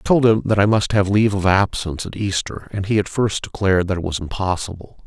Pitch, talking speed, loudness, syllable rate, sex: 100 Hz, 250 wpm, -19 LUFS, 6.1 syllables/s, male